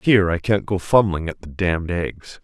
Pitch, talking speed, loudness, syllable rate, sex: 90 Hz, 220 wpm, -20 LUFS, 5.2 syllables/s, male